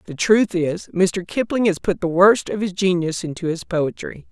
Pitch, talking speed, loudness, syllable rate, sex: 185 Hz, 210 wpm, -20 LUFS, 4.7 syllables/s, female